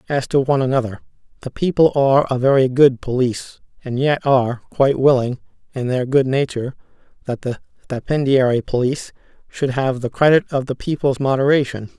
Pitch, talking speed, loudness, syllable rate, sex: 130 Hz, 160 wpm, -18 LUFS, 5.7 syllables/s, male